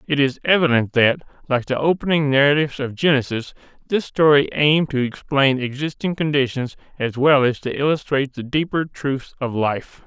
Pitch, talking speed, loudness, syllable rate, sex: 140 Hz, 160 wpm, -19 LUFS, 5.3 syllables/s, male